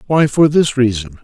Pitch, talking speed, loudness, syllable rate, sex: 130 Hz, 195 wpm, -14 LUFS, 5.2 syllables/s, male